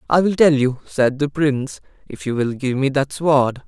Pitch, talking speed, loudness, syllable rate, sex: 140 Hz, 230 wpm, -18 LUFS, 4.8 syllables/s, male